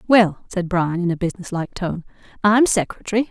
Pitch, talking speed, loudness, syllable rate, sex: 190 Hz, 180 wpm, -20 LUFS, 5.5 syllables/s, female